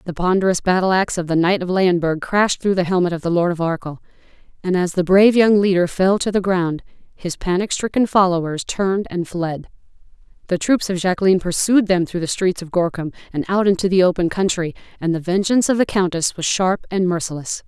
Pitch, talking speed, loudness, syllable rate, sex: 180 Hz, 210 wpm, -18 LUFS, 5.9 syllables/s, female